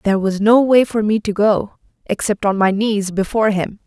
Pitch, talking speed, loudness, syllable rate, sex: 205 Hz, 215 wpm, -16 LUFS, 5.2 syllables/s, female